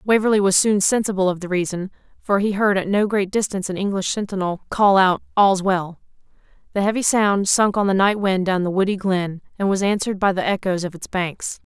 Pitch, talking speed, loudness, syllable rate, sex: 195 Hz, 215 wpm, -20 LUFS, 5.6 syllables/s, female